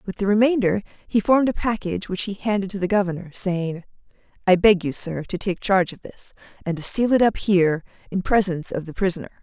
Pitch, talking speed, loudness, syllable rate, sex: 195 Hz, 215 wpm, -21 LUFS, 6.2 syllables/s, female